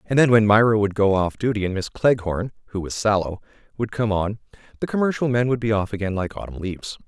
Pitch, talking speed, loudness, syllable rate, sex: 110 Hz, 230 wpm, -21 LUFS, 6.1 syllables/s, male